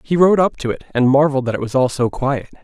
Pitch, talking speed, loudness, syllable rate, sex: 140 Hz, 295 wpm, -17 LUFS, 6.4 syllables/s, male